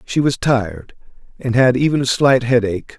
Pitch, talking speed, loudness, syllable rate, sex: 125 Hz, 180 wpm, -16 LUFS, 5.3 syllables/s, male